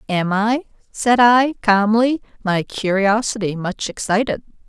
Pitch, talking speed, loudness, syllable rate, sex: 215 Hz, 115 wpm, -18 LUFS, 3.9 syllables/s, female